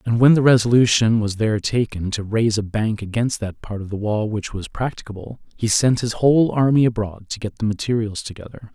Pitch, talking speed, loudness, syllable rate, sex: 110 Hz, 215 wpm, -19 LUFS, 5.7 syllables/s, male